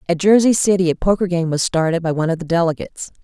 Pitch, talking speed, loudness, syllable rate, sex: 175 Hz, 240 wpm, -17 LUFS, 7.0 syllables/s, female